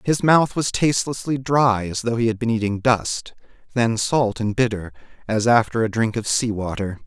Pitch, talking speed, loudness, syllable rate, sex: 115 Hz, 195 wpm, -20 LUFS, 4.9 syllables/s, male